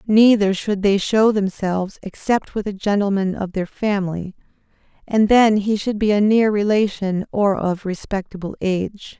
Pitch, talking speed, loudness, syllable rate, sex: 200 Hz, 155 wpm, -19 LUFS, 4.7 syllables/s, female